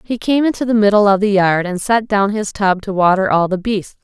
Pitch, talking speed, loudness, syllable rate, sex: 205 Hz, 265 wpm, -15 LUFS, 5.4 syllables/s, female